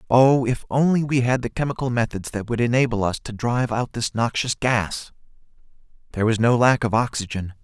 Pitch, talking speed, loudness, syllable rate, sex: 120 Hz, 190 wpm, -21 LUFS, 5.6 syllables/s, male